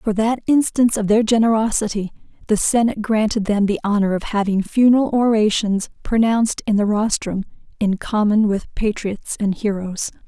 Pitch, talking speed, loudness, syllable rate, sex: 215 Hz, 150 wpm, -18 LUFS, 5.2 syllables/s, female